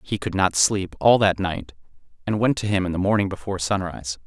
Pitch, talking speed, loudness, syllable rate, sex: 95 Hz, 225 wpm, -22 LUFS, 5.9 syllables/s, male